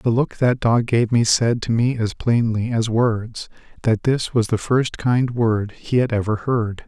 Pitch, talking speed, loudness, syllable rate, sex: 115 Hz, 210 wpm, -20 LUFS, 4.0 syllables/s, male